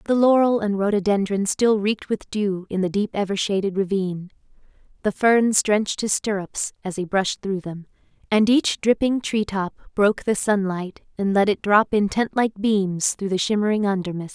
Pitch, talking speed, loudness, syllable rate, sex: 200 Hz, 185 wpm, -21 LUFS, 5.0 syllables/s, female